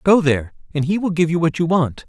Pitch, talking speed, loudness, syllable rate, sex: 160 Hz, 290 wpm, -19 LUFS, 6.2 syllables/s, male